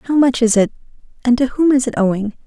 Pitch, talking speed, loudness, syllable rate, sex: 245 Hz, 245 wpm, -16 LUFS, 6.0 syllables/s, female